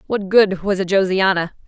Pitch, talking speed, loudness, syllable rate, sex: 190 Hz, 180 wpm, -17 LUFS, 5.0 syllables/s, female